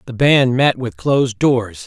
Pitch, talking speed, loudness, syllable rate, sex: 125 Hz, 195 wpm, -15 LUFS, 4.1 syllables/s, male